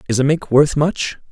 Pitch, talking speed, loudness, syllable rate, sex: 145 Hz, 225 wpm, -16 LUFS, 5.0 syllables/s, male